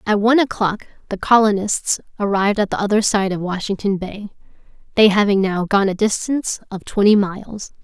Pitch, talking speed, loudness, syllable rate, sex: 205 Hz, 170 wpm, -18 LUFS, 5.6 syllables/s, female